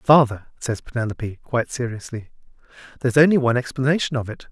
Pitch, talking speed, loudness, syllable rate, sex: 125 Hz, 145 wpm, -21 LUFS, 6.7 syllables/s, male